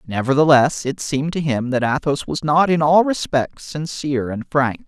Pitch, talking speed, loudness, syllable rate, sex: 140 Hz, 185 wpm, -18 LUFS, 4.9 syllables/s, male